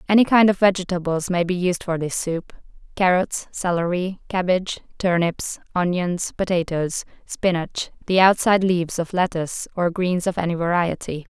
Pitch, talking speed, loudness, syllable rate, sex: 180 Hz, 145 wpm, -21 LUFS, 5.0 syllables/s, female